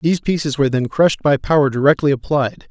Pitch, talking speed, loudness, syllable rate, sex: 145 Hz, 200 wpm, -16 LUFS, 6.5 syllables/s, male